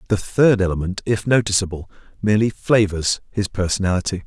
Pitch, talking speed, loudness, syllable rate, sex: 100 Hz, 125 wpm, -19 LUFS, 5.9 syllables/s, male